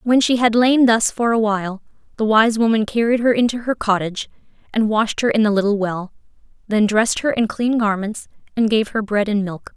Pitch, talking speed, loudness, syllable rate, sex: 220 Hz, 215 wpm, -18 LUFS, 5.5 syllables/s, female